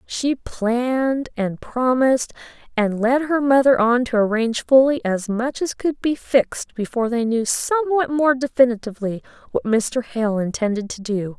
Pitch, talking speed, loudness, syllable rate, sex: 245 Hz, 160 wpm, -20 LUFS, 4.7 syllables/s, female